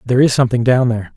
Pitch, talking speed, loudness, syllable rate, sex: 120 Hz, 260 wpm, -14 LUFS, 8.7 syllables/s, male